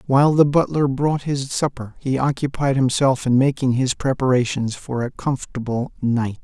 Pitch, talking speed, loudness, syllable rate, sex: 130 Hz, 160 wpm, -20 LUFS, 4.9 syllables/s, male